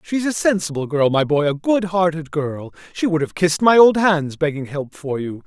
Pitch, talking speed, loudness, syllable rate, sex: 165 Hz, 230 wpm, -18 LUFS, 5.0 syllables/s, male